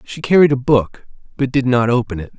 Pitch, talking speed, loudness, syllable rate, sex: 125 Hz, 225 wpm, -15 LUFS, 5.6 syllables/s, male